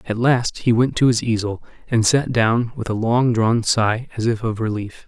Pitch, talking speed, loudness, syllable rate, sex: 115 Hz, 225 wpm, -19 LUFS, 4.7 syllables/s, male